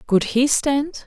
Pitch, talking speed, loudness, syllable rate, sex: 260 Hz, 170 wpm, -19 LUFS, 3.2 syllables/s, female